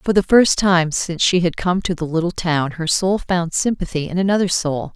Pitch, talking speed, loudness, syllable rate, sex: 175 Hz, 230 wpm, -18 LUFS, 5.2 syllables/s, female